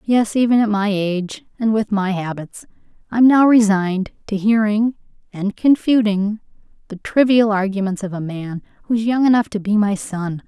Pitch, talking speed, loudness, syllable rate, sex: 210 Hz, 180 wpm, -17 LUFS, 5.0 syllables/s, female